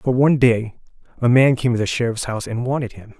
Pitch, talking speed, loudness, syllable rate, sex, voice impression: 120 Hz, 245 wpm, -18 LUFS, 6.4 syllables/s, male, very masculine, adult-like, cool, slightly refreshing, sincere